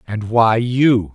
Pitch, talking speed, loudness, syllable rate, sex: 115 Hz, 155 wpm, -15 LUFS, 3.0 syllables/s, male